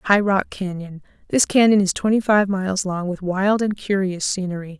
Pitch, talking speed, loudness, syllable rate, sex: 190 Hz, 175 wpm, -20 LUFS, 5.0 syllables/s, female